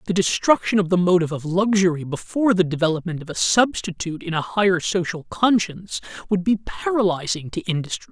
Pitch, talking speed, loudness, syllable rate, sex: 185 Hz, 170 wpm, -21 LUFS, 6.0 syllables/s, male